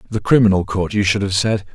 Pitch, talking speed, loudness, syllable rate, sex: 100 Hz, 240 wpm, -17 LUFS, 6.1 syllables/s, male